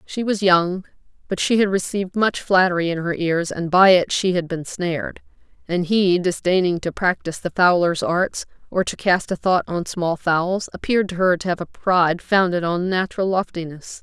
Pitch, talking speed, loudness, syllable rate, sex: 180 Hz, 195 wpm, -20 LUFS, 5.0 syllables/s, female